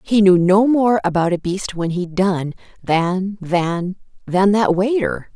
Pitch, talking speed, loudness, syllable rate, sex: 190 Hz, 145 wpm, -17 LUFS, 3.7 syllables/s, female